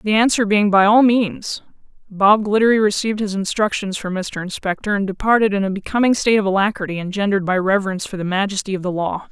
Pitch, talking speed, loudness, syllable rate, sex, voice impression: 200 Hz, 200 wpm, -18 LUFS, 6.4 syllables/s, female, feminine, adult-like, slightly powerful, slightly muffled, slightly unique, slightly sharp